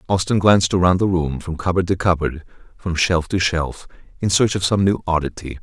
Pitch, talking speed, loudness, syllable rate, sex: 90 Hz, 205 wpm, -19 LUFS, 5.4 syllables/s, male